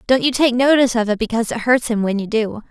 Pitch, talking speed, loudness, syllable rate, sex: 235 Hz, 290 wpm, -17 LUFS, 6.8 syllables/s, female